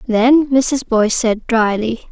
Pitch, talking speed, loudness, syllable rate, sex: 240 Hz, 140 wpm, -15 LUFS, 4.0 syllables/s, female